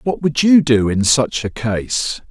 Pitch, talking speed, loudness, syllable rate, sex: 130 Hz, 210 wpm, -16 LUFS, 3.7 syllables/s, male